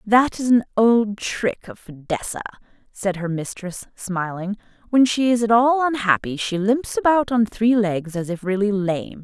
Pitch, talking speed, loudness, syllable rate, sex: 210 Hz, 175 wpm, -20 LUFS, 4.3 syllables/s, female